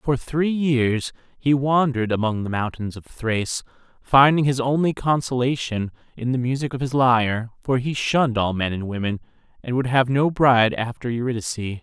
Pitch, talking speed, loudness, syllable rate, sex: 125 Hz, 170 wpm, -21 LUFS, 5.2 syllables/s, male